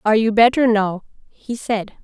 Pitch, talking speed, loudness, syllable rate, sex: 220 Hz, 175 wpm, -17 LUFS, 4.9 syllables/s, female